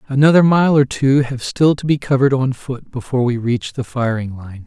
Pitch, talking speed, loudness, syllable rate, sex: 130 Hz, 220 wpm, -16 LUFS, 5.4 syllables/s, male